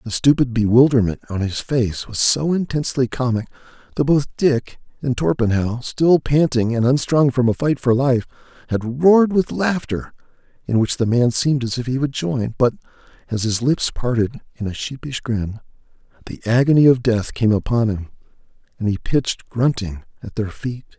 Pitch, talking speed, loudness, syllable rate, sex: 125 Hz, 175 wpm, -19 LUFS, 5.0 syllables/s, male